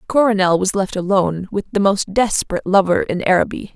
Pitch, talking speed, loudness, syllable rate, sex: 200 Hz, 175 wpm, -17 LUFS, 6.1 syllables/s, female